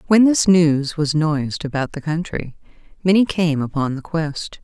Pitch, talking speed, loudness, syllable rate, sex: 160 Hz, 170 wpm, -19 LUFS, 4.5 syllables/s, female